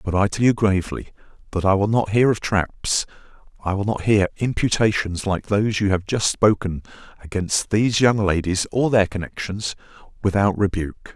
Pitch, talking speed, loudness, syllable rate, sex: 100 Hz, 165 wpm, -21 LUFS, 5.1 syllables/s, male